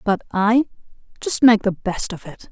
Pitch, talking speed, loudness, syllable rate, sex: 215 Hz, 190 wpm, -19 LUFS, 4.4 syllables/s, female